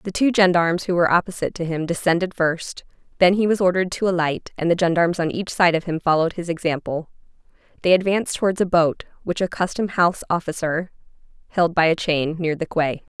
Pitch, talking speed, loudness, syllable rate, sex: 175 Hz, 200 wpm, -20 LUFS, 6.2 syllables/s, female